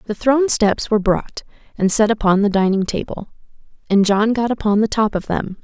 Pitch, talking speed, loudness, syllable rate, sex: 210 Hz, 200 wpm, -17 LUFS, 5.5 syllables/s, female